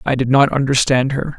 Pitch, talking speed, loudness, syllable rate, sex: 135 Hz, 215 wpm, -15 LUFS, 5.4 syllables/s, male